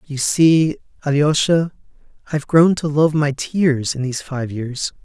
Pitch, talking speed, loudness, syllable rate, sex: 145 Hz, 155 wpm, -18 LUFS, 4.2 syllables/s, male